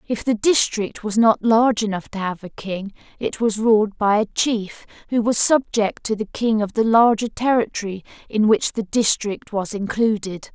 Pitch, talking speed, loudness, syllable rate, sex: 215 Hz, 190 wpm, -20 LUFS, 4.6 syllables/s, female